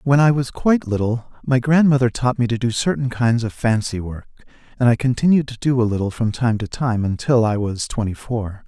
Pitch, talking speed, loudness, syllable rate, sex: 120 Hz, 220 wpm, -19 LUFS, 5.4 syllables/s, male